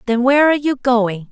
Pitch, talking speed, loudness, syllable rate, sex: 250 Hz, 230 wpm, -15 LUFS, 6.1 syllables/s, female